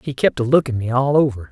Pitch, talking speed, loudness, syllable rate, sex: 130 Hz, 275 wpm, -18 LUFS, 6.4 syllables/s, male